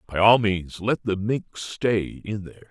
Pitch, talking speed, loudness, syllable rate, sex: 105 Hz, 200 wpm, -23 LUFS, 4.2 syllables/s, male